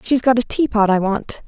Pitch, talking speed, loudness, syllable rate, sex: 225 Hz, 245 wpm, -17 LUFS, 5.1 syllables/s, female